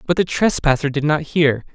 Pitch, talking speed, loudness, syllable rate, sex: 155 Hz, 205 wpm, -18 LUFS, 5.2 syllables/s, male